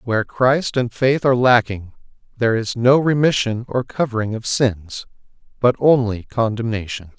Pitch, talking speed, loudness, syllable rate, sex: 120 Hz, 140 wpm, -18 LUFS, 4.7 syllables/s, male